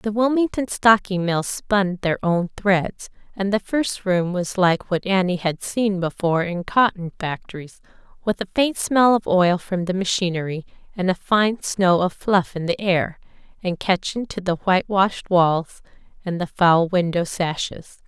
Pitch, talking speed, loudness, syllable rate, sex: 190 Hz, 175 wpm, -21 LUFS, 4.3 syllables/s, female